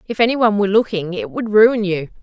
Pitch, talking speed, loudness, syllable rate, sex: 205 Hz, 245 wpm, -16 LUFS, 6.5 syllables/s, female